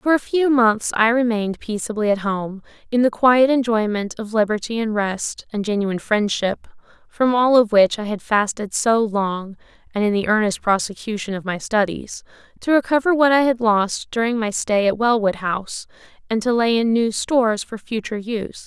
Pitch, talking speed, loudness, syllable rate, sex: 220 Hz, 185 wpm, -19 LUFS, 5.0 syllables/s, female